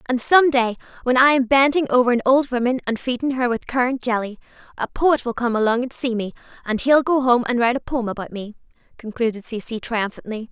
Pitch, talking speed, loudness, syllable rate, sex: 245 Hz, 215 wpm, -20 LUFS, 5.9 syllables/s, female